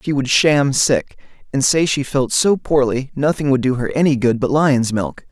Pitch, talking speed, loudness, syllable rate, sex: 135 Hz, 215 wpm, -16 LUFS, 4.6 syllables/s, male